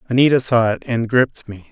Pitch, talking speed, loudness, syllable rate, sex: 120 Hz, 210 wpm, -17 LUFS, 5.6 syllables/s, male